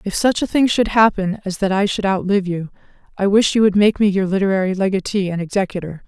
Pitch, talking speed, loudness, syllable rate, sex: 195 Hz, 225 wpm, -17 LUFS, 6.2 syllables/s, female